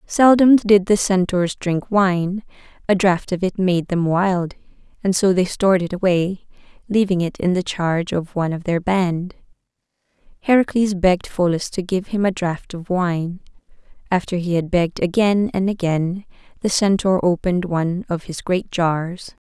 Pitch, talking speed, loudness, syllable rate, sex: 185 Hz, 165 wpm, -19 LUFS, 4.7 syllables/s, female